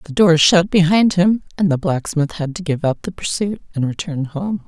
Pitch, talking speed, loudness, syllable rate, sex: 180 Hz, 220 wpm, -17 LUFS, 4.9 syllables/s, female